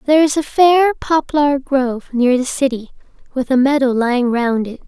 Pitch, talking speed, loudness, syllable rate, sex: 265 Hz, 185 wpm, -15 LUFS, 5.0 syllables/s, female